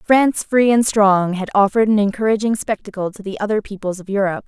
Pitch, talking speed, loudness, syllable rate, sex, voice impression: 205 Hz, 200 wpm, -17 LUFS, 6.2 syllables/s, female, feminine, adult-like, tensed, powerful, slightly bright, raspy, slightly intellectual, slightly friendly, slightly unique, lively, slightly intense, sharp